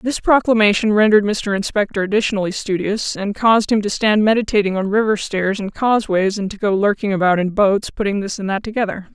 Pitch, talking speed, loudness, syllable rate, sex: 205 Hz, 195 wpm, -17 LUFS, 6.0 syllables/s, female